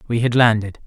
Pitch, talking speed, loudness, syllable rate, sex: 115 Hz, 210 wpm, -17 LUFS, 5.9 syllables/s, male